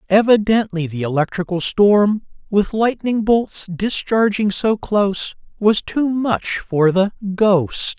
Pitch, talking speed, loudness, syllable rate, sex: 205 Hz, 120 wpm, -18 LUFS, 3.7 syllables/s, male